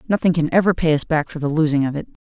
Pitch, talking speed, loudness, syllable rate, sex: 160 Hz, 290 wpm, -19 LUFS, 7.2 syllables/s, female